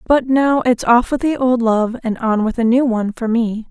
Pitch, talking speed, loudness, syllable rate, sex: 240 Hz, 260 wpm, -16 LUFS, 4.9 syllables/s, female